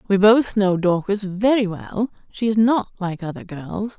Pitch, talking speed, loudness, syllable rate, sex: 200 Hz, 180 wpm, -20 LUFS, 4.3 syllables/s, female